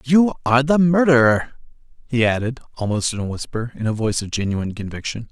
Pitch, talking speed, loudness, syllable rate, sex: 125 Hz, 180 wpm, -19 LUFS, 6.2 syllables/s, male